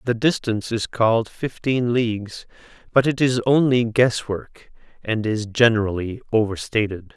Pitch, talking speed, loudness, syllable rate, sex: 115 Hz, 135 wpm, -21 LUFS, 4.6 syllables/s, male